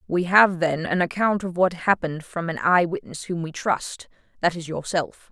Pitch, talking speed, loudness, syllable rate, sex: 175 Hz, 190 wpm, -23 LUFS, 4.8 syllables/s, female